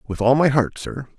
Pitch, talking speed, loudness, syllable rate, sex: 130 Hz, 255 wpm, -18 LUFS, 5.1 syllables/s, male